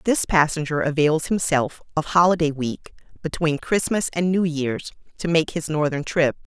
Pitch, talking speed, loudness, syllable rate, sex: 160 Hz, 155 wpm, -22 LUFS, 4.7 syllables/s, female